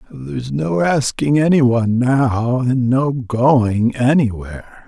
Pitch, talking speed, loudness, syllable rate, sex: 125 Hz, 125 wpm, -16 LUFS, 3.7 syllables/s, male